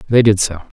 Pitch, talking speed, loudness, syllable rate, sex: 105 Hz, 230 wpm, -15 LUFS, 5.8 syllables/s, male